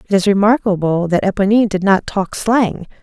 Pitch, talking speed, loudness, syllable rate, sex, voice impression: 200 Hz, 180 wpm, -15 LUFS, 5.4 syllables/s, female, feminine, adult-like, tensed, powerful, soft, slightly raspy, intellectual, calm, reassuring, elegant, slightly lively, slightly sharp, slightly modest